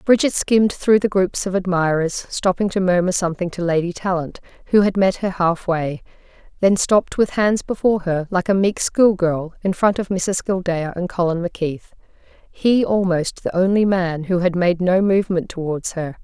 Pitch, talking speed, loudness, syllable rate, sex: 185 Hz, 180 wpm, -19 LUFS, 5.1 syllables/s, female